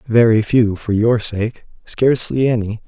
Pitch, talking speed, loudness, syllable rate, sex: 115 Hz, 145 wpm, -16 LUFS, 4.3 syllables/s, male